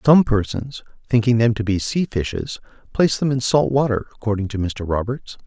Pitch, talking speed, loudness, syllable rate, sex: 120 Hz, 185 wpm, -20 LUFS, 5.4 syllables/s, male